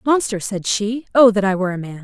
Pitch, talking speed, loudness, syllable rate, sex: 210 Hz, 265 wpm, -18 LUFS, 6.0 syllables/s, female